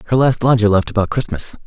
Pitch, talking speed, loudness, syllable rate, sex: 110 Hz, 215 wpm, -16 LUFS, 6.7 syllables/s, male